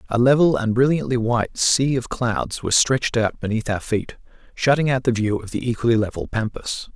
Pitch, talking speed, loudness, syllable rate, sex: 120 Hz, 200 wpm, -20 LUFS, 5.4 syllables/s, male